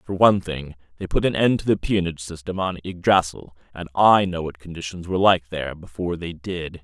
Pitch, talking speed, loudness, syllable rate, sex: 85 Hz, 210 wpm, -22 LUFS, 5.8 syllables/s, male